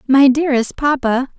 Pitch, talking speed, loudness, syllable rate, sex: 265 Hz, 130 wpm, -15 LUFS, 5.1 syllables/s, female